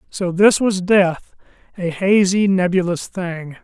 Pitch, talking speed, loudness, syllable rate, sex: 185 Hz, 115 wpm, -17 LUFS, 3.7 syllables/s, male